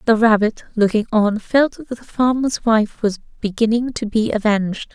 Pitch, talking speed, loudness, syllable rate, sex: 225 Hz, 170 wpm, -18 LUFS, 4.8 syllables/s, female